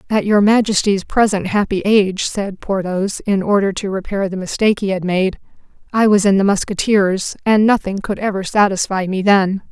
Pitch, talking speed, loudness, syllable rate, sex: 200 Hz, 180 wpm, -16 LUFS, 5.1 syllables/s, female